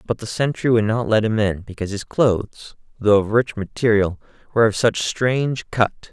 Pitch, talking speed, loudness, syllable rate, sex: 110 Hz, 195 wpm, -20 LUFS, 5.2 syllables/s, male